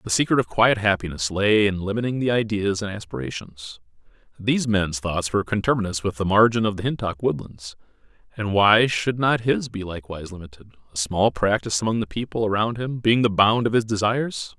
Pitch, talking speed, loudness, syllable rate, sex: 105 Hz, 185 wpm, -22 LUFS, 5.7 syllables/s, male